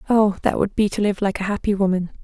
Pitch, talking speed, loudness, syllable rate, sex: 200 Hz, 270 wpm, -20 LUFS, 6.4 syllables/s, female